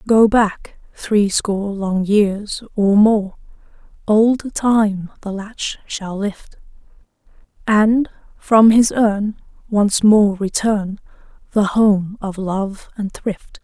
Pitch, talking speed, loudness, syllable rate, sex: 205 Hz, 115 wpm, -17 LUFS, 2.9 syllables/s, female